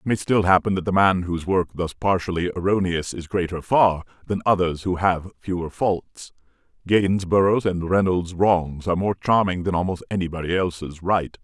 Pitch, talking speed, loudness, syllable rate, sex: 90 Hz, 175 wpm, -22 LUFS, 5.0 syllables/s, male